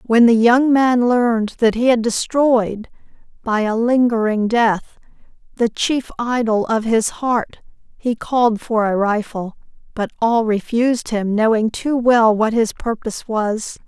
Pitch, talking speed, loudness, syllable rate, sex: 230 Hz, 150 wpm, -17 LUFS, 4.0 syllables/s, female